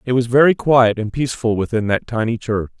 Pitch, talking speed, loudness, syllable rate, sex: 115 Hz, 215 wpm, -17 LUFS, 5.8 syllables/s, male